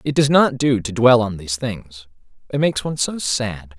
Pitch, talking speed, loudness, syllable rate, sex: 120 Hz, 220 wpm, -18 LUFS, 5.2 syllables/s, male